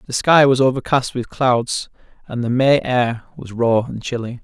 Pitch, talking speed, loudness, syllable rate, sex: 125 Hz, 190 wpm, -17 LUFS, 4.5 syllables/s, male